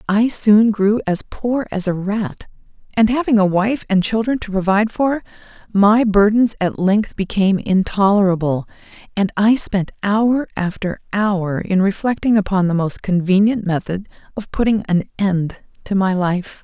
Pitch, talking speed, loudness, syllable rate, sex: 200 Hz, 155 wpm, -17 LUFS, 4.5 syllables/s, female